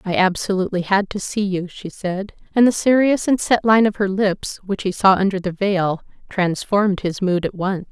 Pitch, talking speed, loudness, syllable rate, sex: 195 Hz, 210 wpm, -19 LUFS, 4.9 syllables/s, female